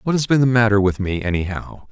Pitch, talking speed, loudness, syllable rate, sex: 110 Hz, 250 wpm, -18 LUFS, 6.1 syllables/s, male